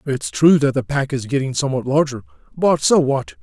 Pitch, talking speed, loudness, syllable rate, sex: 135 Hz, 210 wpm, -18 LUFS, 5.4 syllables/s, male